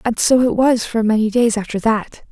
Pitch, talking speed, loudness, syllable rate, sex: 225 Hz, 235 wpm, -16 LUFS, 5.1 syllables/s, female